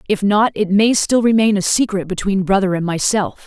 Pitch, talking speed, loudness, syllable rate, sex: 200 Hz, 210 wpm, -16 LUFS, 5.2 syllables/s, female